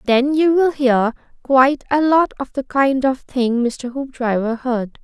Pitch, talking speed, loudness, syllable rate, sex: 260 Hz, 180 wpm, -17 LUFS, 4.0 syllables/s, female